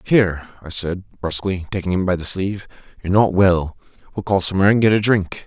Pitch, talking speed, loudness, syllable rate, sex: 95 Hz, 210 wpm, -18 LUFS, 6.5 syllables/s, male